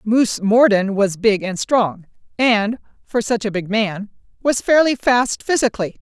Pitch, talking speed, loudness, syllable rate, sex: 220 Hz, 160 wpm, -18 LUFS, 4.4 syllables/s, female